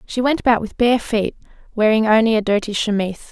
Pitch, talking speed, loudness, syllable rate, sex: 220 Hz, 200 wpm, -18 LUFS, 6.4 syllables/s, female